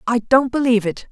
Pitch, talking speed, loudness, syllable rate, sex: 235 Hz, 215 wpm, -17 LUFS, 6.3 syllables/s, female